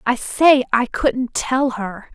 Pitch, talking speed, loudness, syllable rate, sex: 245 Hz, 170 wpm, -18 LUFS, 3.1 syllables/s, female